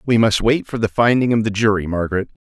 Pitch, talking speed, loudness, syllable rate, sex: 110 Hz, 245 wpm, -17 LUFS, 6.3 syllables/s, male